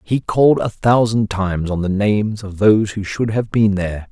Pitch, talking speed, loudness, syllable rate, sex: 105 Hz, 220 wpm, -17 LUFS, 5.3 syllables/s, male